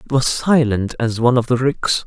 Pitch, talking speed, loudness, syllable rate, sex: 125 Hz, 235 wpm, -17 LUFS, 5.2 syllables/s, male